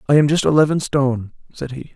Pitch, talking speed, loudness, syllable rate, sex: 140 Hz, 215 wpm, -17 LUFS, 6.4 syllables/s, male